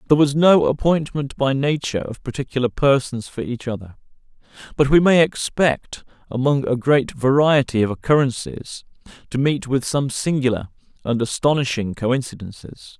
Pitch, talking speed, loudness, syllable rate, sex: 130 Hz, 140 wpm, -19 LUFS, 5.0 syllables/s, male